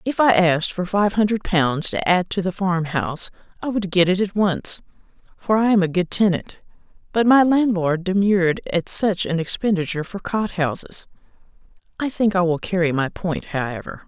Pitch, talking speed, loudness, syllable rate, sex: 185 Hz, 185 wpm, -20 LUFS, 5.0 syllables/s, female